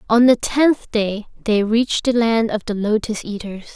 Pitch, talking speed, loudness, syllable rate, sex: 220 Hz, 190 wpm, -18 LUFS, 4.6 syllables/s, female